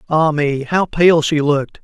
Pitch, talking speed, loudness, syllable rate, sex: 155 Hz, 195 wpm, -15 LUFS, 4.2 syllables/s, male